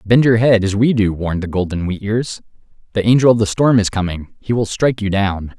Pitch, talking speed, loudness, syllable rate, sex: 105 Hz, 245 wpm, -16 LUFS, 5.7 syllables/s, male